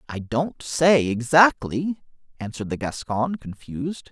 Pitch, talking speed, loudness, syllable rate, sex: 135 Hz, 115 wpm, -22 LUFS, 4.2 syllables/s, male